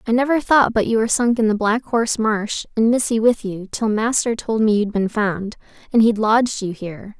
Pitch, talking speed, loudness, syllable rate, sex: 220 Hz, 225 wpm, -18 LUFS, 5.3 syllables/s, female